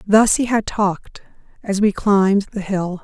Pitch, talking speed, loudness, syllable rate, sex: 200 Hz, 180 wpm, -18 LUFS, 4.6 syllables/s, female